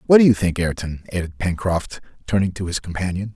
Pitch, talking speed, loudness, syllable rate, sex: 95 Hz, 195 wpm, -21 LUFS, 5.9 syllables/s, male